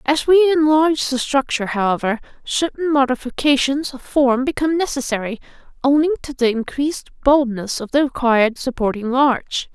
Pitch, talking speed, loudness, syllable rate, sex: 270 Hz, 135 wpm, -18 LUFS, 5.4 syllables/s, female